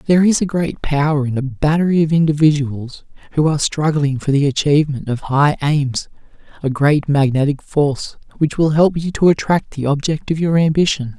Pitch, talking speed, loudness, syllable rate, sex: 150 Hz, 180 wpm, -16 LUFS, 5.3 syllables/s, male